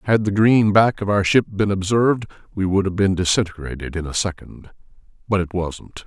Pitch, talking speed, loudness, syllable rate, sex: 100 Hz, 200 wpm, -19 LUFS, 5.3 syllables/s, male